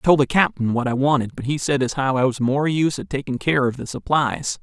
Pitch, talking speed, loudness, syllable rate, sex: 135 Hz, 285 wpm, -20 LUFS, 5.8 syllables/s, male